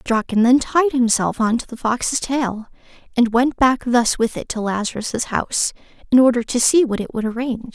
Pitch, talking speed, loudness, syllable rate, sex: 240 Hz, 210 wpm, -18 LUFS, 5.1 syllables/s, female